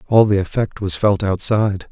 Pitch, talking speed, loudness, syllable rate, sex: 100 Hz, 190 wpm, -17 LUFS, 5.3 syllables/s, male